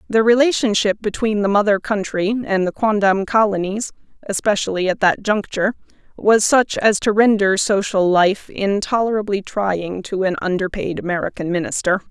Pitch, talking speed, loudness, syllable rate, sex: 200 Hz, 145 wpm, -18 LUFS, 5.0 syllables/s, female